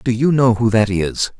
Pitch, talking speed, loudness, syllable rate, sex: 115 Hz, 260 wpm, -16 LUFS, 4.6 syllables/s, male